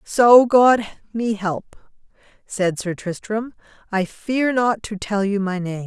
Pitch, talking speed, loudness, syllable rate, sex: 210 Hz, 155 wpm, -19 LUFS, 3.5 syllables/s, female